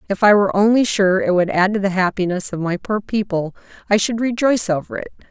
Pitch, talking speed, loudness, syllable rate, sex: 200 Hz, 225 wpm, -18 LUFS, 6.1 syllables/s, female